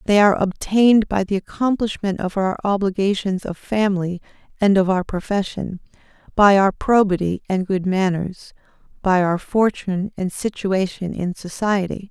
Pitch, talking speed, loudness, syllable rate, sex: 195 Hz, 140 wpm, -20 LUFS, 4.9 syllables/s, female